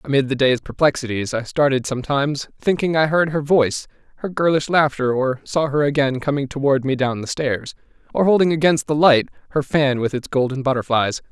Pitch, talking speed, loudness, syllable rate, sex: 140 Hz, 190 wpm, -19 LUFS, 5.6 syllables/s, male